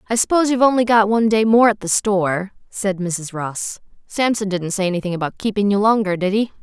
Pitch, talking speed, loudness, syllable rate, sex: 205 Hz, 215 wpm, -18 LUFS, 5.9 syllables/s, female